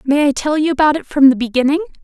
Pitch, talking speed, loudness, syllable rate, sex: 290 Hz, 265 wpm, -14 LUFS, 7.0 syllables/s, female